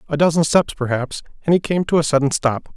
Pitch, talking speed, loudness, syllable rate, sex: 150 Hz, 240 wpm, -18 LUFS, 6.1 syllables/s, male